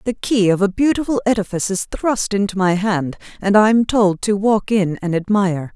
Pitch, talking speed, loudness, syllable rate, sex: 205 Hz, 200 wpm, -17 LUFS, 5.0 syllables/s, female